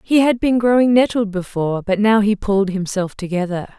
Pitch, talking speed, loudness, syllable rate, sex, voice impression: 205 Hz, 190 wpm, -17 LUFS, 5.4 syllables/s, female, very feminine, young, middle-aged, slightly thin, tensed, very powerful, bright, slightly soft, clear, muffled, fluent, raspy, cute, cool, intellectual, very refreshing, sincere, very calm, friendly, reassuring, unique, slightly elegant, wild, slightly sweet, lively, kind, slightly modest